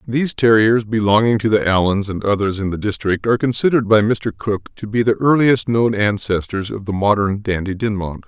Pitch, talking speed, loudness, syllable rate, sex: 105 Hz, 195 wpm, -17 LUFS, 5.5 syllables/s, male